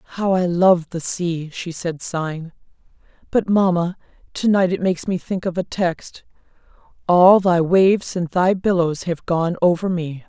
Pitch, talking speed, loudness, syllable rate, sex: 175 Hz, 165 wpm, -19 LUFS, 4.4 syllables/s, female